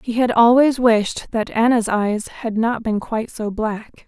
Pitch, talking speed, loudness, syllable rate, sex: 225 Hz, 190 wpm, -18 LUFS, 4.3 syllables/s, female